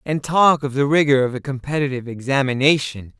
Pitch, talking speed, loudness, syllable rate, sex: 135 Hz, 170 wpm, -18 LUFS, 5.9 syllables/s, male